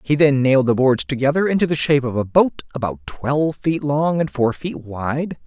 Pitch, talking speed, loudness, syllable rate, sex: 140 Hz, 220 wpm, -19 LUFS, 5.3 syllables/s, male